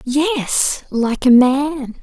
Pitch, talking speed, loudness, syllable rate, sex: 265 Hz, 120 wpm, -16 LUFS, 2.2 syllables/s, female